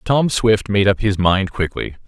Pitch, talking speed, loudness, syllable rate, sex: 105 Hz, 200 wpm, -17 LUFS, 4.3 syllables/s, male